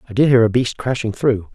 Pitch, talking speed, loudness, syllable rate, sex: 115 Hz, 270 wpm, -17 LUFS, 5.9 syllables/s, male